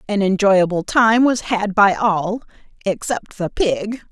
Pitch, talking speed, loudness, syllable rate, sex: 205 Hz, 130 wpm, -17 LUFS, 3.8 syllables/s, female